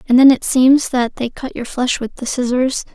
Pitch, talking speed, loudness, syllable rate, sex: 255 Hz, 245 wpm, -16 LUFS, 4.7 syllables/s, female